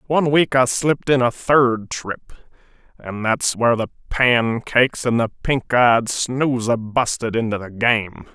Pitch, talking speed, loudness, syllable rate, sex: 120 Hz, 160 wpm, -18 LUFS, 4.4 syllables/s, male